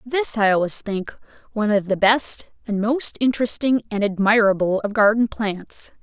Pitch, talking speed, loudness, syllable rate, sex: 215 Hz, 160 wpm, -20 LUFS, 4.8 syllables/s, female